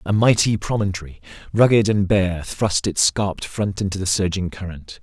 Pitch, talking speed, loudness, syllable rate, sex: 95 Hz, 165 wpm, -20 LUFS, 5.0 syllables/s, male